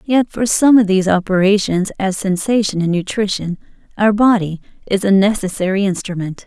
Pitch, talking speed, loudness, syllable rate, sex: 195 Hz, 150 wpm, -16 LUFS, 5.3 syllables/s, female